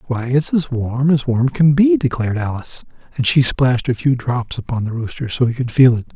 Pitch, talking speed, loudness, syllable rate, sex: 130 Hz, 235 wpm, -17 LUFS, 5.6 syllables/s, male